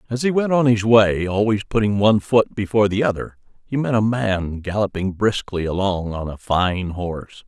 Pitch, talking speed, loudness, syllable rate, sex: 105 Hz, 195 wpm, -20 LUFS, 5.1 syllables/s, male